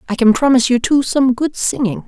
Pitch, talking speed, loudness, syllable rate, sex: 245 Hz, 230 wpm, -14 LUFS, 5.8 syllables/s, female